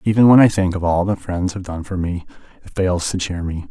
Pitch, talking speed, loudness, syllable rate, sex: 95 Hz, 275 wpm, -18 LUFS, 5.6 syllables/s, male